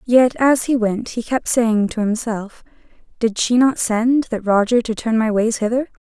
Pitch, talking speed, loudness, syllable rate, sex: 230 Hz, 200 wpm, -18 LUFS, 4.4 syllables/s, female